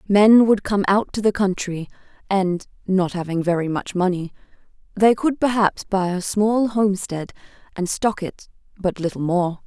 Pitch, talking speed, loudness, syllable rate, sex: 195 Hz, 160 wpm, -20 LUFS, 4.6 syllables/s, female